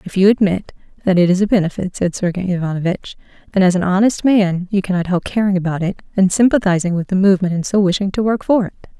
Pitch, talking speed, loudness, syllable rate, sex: 190 Hz, 225 wpm, -16 LUFS, 6.5 syllables/s, female